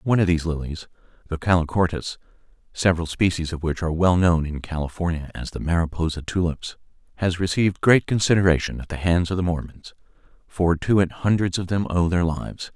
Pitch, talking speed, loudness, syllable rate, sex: 85 Hz, 180 wpm, -22 LUFS, 6.0 syllables/s, male